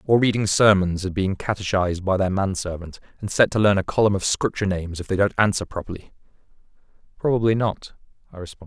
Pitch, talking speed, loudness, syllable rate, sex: 100 Hz, 185 wpm, -21 LUFS, 6.5 syllables/s, male